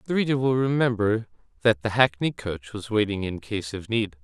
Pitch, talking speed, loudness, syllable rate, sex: 110 Hz, 200 wpm, -25 LUFS, 5.2 syllables/s, male